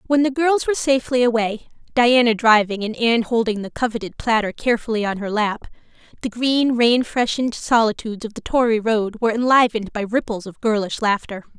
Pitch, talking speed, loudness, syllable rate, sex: 230 Hz, 175 wpm, -19 LUFS, 6.0 syllables/s, female